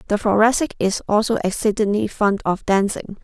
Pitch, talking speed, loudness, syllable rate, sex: 210 Hz, 150 wpm, -19 LUFS, 5.3 syllables/s, female